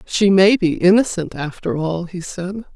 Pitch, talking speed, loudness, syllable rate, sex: 180 Hz, 175 wpm, -17 LUFS, 4.3 syllables/s, female